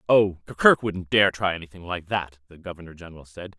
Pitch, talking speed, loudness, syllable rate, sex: 90 Hz, 200 wpm, -22 LUFS, 5.9 syllables/s, male